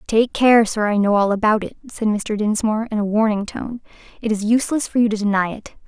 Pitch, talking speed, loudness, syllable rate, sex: 215 Hz, 235 wpm, -19 LUFS, 5.9 syllables/s, female